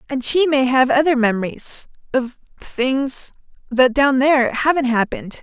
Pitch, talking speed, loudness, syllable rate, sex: 260 Hz, 120 wpm, -17 LUFS, 4.6 syllables/s, female